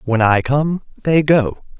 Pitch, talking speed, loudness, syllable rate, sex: 135 Hz, 170 wpm, -16 LUFS, 3.5 syllables/s, male